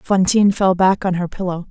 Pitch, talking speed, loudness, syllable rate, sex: 185 Hz, 210 wpm, -16 LUFS, 5.5 syllables/s, female